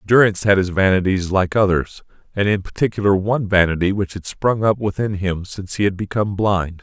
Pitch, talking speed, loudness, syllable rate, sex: 100 Hz, 195 wpm, -18 LUFS, 5.8 syllables/s, male